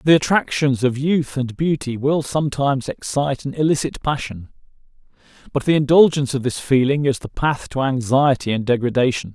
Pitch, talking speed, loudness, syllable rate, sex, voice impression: 140 Hz, 160 wpm, -19 LUFS, 5.5 syllables/s, male, masculine, adult-like, tensed, powerful, clear, fluent, slightly raspy, intellectual, slightly friendly, unique, wild, lively, slightly intense